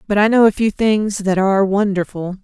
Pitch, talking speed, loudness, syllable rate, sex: 200 Hz, 220 wpm, -16 LUFS, 5.4 syllables/s, female